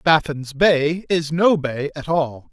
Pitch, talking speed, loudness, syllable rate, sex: 155 Hz, 165 wpm, -19 LUFS, 3.5 syllables/s, male